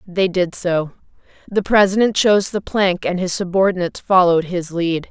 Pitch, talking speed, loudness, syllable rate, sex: 185 Hz, 165 wpm, -17 LUFS, 5.2 syllables/s, female